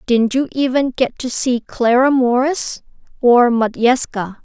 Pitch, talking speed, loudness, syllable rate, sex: 250 Hz, 135 wpm, -16 LUFS, 3.9 syllables/s, female